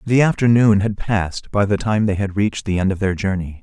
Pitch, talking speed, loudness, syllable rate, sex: 100 Hz, 250 wpm, -18 LUFS, 5.7 syllables/s, male